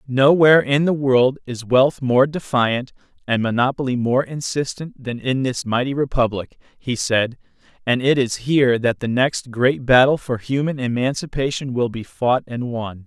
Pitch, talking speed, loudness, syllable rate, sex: 130 Hz, 165 wpm, -19 LUFS, 4.5 syllables/s, male